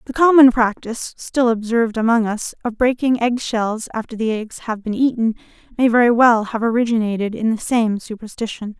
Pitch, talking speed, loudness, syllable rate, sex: 230 Hz, 175 wpm, -18 LUFS, 5.3 syllables/s, female